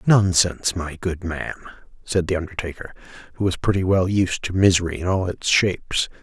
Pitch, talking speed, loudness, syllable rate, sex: 90 Hz, 175 wpm, -21 LUFS, 5.4 syllables/s, male